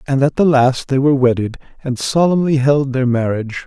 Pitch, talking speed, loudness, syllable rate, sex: 135 Hz, 195 wpm, -15 LUFS, 5.5 syllables/s, male